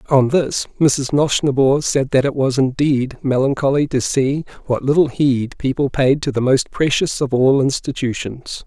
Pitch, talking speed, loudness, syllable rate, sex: 135 Hz, 165 wpm, -17 LUFS, 4.5 syllables/s, male